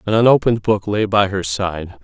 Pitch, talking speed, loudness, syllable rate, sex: 100 Hz, 205 wpm, -17 LUFS, 5.3 syllables/s, male